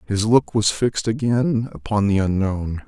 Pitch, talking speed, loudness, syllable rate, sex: 105 Hz, 165 wpm, -20 LUFS, 4.4 syllables/s, male